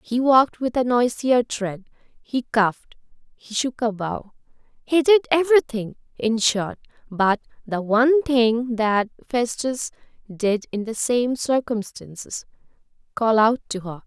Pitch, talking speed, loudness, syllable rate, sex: 235 Hz, 130 wpm, -21 LUFS, 4.1 syllables/s, female